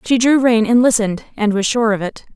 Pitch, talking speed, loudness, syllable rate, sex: 225 Hz, 255 wpm, -15 LUFS, 5.8 syllables/s, female